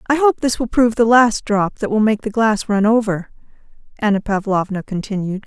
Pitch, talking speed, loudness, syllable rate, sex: 215 Hz, 200 wpm, -17 LUFS, 5.4 syllables/s, female